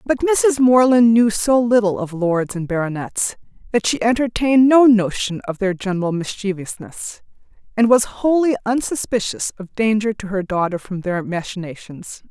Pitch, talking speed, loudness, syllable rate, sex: 215 Hz, 150 wpm, -18 LUFS, 4.8 syllables/s, female